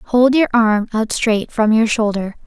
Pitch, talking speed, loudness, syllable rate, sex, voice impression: 225 Hz, 195 wpm, -16 LUFS, 4.0 syllables/s, female, feminine, slightly young, slightly relaxed, slightly weak, slightly bright, soft, slightly raspy, cute, calm, friendly, reassuring, kind, modest